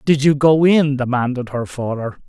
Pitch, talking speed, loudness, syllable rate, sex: 135 Hz, 185 wpm, -17 LUFS, 4.8 syllables/s, male